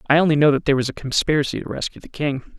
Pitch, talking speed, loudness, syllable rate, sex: 145 Hz, 280 wpm, -20 LUFS, 7.6 syllables/s, male